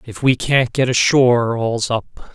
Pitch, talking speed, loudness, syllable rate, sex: 120 Hz, 180 wpm, -16 LUFS, 4.0 syllables/s, male